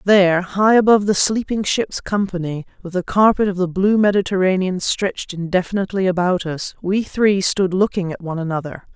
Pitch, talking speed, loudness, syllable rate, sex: 190 Hz, 170 wpm, -18 LUFS, 5.5 syllables/s, female